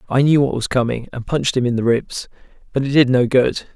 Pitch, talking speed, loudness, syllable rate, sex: 130 Hz, 255 wpm, -18 LUFS, 5.9 syllables/s, male